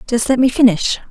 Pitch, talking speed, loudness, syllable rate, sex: 240 Hz, 215 wpm, -14 LUFS, 5.6 syllables/s, female